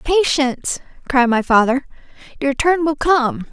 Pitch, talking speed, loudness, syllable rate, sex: 280 Hz, 135 wpm, -17 LUFS, 4.3 syllables/s, female